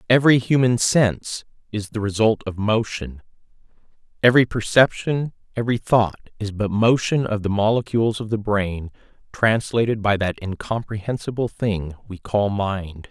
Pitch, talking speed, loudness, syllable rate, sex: 110 Hz, 135 wpm, -21 LUFS, 4.9 syllables/s, male